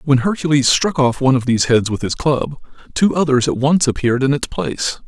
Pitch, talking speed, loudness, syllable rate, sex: 135 Hz, 225 wpm, -16 LUFS, 5.9 syllables/s, male